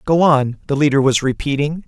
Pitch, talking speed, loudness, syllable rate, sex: 140 Hz, 190 wpm, -16 LUFS, 5.4 syllables/s, male